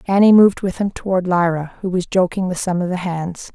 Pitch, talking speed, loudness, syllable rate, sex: 185 Hz, 235 wpm, -17 LUFS, 5.7 syllables/s, female